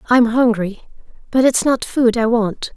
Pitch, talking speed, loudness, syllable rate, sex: 235 Hz, 175 wpm, -16 LUFS, 4.2 syllables/s, female